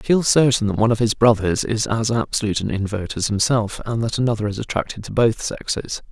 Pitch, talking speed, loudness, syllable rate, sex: 110 Hz, 225 wpm, -20 LUFS, 6.1 syllables/s, male